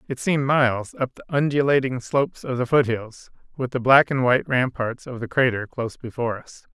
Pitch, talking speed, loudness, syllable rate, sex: 125 Hz, 195 wpm, -22 LUFS, 5.7 syllables/s, male